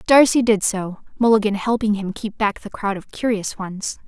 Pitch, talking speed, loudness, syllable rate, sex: 210 Hz, 190 wpm, -20 LUFS, 4.8 syllables/s, female